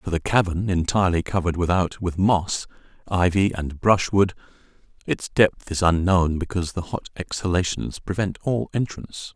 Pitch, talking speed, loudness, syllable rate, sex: 90 Hz, 145 wpm, -23 LUFS, 5.2 syllables/s, male